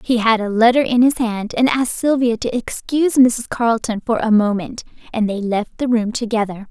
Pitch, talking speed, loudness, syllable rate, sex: 230 Hz, 205 wpm, -17 LUFS, 5.3 syllables/s, female